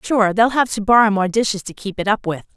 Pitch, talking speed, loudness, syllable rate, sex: 210 Hz, 280 wpm, -17 LUFS, 5.9 syllables/s, female